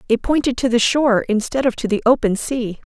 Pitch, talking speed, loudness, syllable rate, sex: 240 Hz, 225 wpm, -18 LUFS, 5.7 syllables/s, female